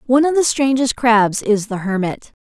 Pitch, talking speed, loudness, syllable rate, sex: 235 Hz, 195 wpm, -16 LUFS, 5.0 syllables/s, female